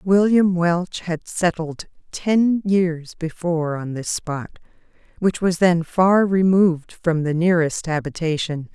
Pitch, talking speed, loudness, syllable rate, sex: 170 Hz, 130 wpm, -20 LUFS, 3.9 syllables/s, female